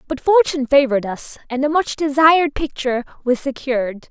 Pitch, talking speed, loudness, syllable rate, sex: 275 Hz, 160 wpm, -18 LUFS, 5.8 syllables/s, female